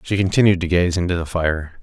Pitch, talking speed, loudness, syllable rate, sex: 90 Hz, 230 wpm, -19 LUFS, 5.8 syllables/s, male